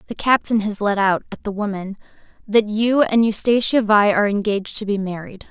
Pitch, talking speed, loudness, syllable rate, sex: 210 Hz, 195 wpm, -19 LUFS, 5.5 syllables/s, female